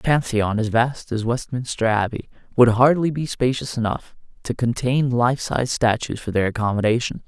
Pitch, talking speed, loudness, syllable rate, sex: 120 Hz, 165 wpm, -21 LUFS, 5.1 syllables/s, male